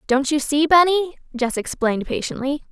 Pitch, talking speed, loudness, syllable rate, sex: 285 Hz, 155 wpm, -20 LUFS, 5.7 syllables/s, female